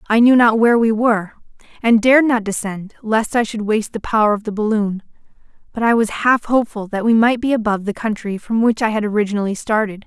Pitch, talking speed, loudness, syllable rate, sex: 220 Hz, 220 wpm, -17 LUFS, 6.2 syllables/s, female